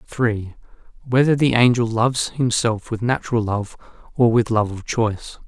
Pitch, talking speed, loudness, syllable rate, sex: 115 Hz, 155 wpm, -19 LUFS, 5.3 syllables/s, male